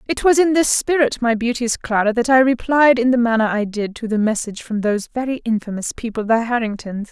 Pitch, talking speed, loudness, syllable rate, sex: 235 Hz, 220 wpm, -18 LUFS, 5.8 syllables/s, female